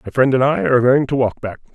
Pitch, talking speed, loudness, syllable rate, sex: 125 Hz, 310 wpm, -16 LUFS, 7.8 syllables/s, male